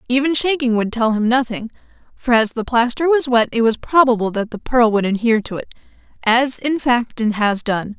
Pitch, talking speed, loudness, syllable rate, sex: 235 Hz, 205 wpm, -17 LUFS, 5.3 syllables/s, female